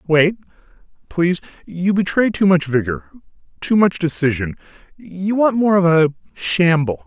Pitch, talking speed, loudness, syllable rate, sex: 170 Hz, 135 wpm, -17 LUFS, 4.5 syllables/s, male